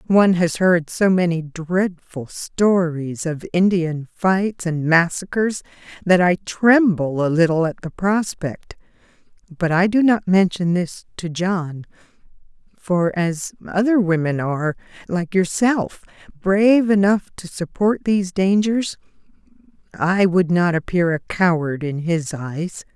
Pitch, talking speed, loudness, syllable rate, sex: 180 Hz, 130 wpm, -19 LUFS, 3.9 syllables/s, female